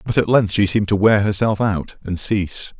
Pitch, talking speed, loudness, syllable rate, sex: 100 Hz, 235 wpm, -18 LUFS, 5.4 syllables/s, male